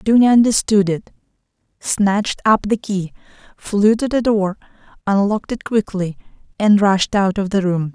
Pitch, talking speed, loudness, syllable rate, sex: 205 Hz, 150 wpm, -17 LUFS, 4.6 syllables/s, female